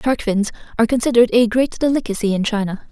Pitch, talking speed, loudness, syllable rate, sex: 225 Hz, 185 wpm, -18 LUFS, 6.6 syllables/s, female